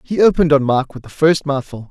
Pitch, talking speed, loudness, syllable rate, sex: 145 Hz, 250 wpm, -15 LUFS, 6.1 syllables/s, male